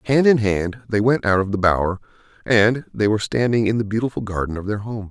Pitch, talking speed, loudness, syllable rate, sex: 105 Hz, 235 wpm, -20 LUFS, 6.0 syllables/s, male